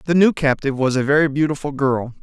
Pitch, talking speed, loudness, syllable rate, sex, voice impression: 140 Hz, 215 wpm, -18 LUFS, 6.5 syllables/s, male, masculine, adult-like, fluent, refreshing, sincere